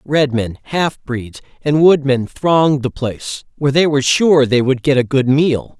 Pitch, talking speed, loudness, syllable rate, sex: 140 Hz, 205 wpm, -15 LUFS, 4.6 syllables/s, male